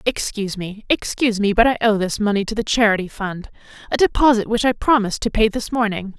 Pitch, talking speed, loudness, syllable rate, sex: 215 Hz, 205 wpm, -19 LUFS, 6.1 syllables/s, female